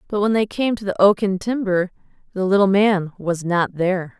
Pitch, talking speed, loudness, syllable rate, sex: 195 Hz, 200 wpm, -19 LUFS, 5.3 syllables/s, female